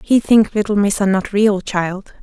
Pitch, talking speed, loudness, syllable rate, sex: 200 Hz, 190 wpm, -16 LUFS, 4.4 syllables/s, female